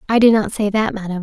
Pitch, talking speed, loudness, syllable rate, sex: 210 Hz, 295 wpm, -16 LUFS, 6.4 syllables/s, female